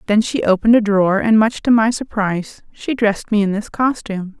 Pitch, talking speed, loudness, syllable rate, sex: 215 Hz, 220 wpm, -16 LUFS, 5.8 syllables/s, female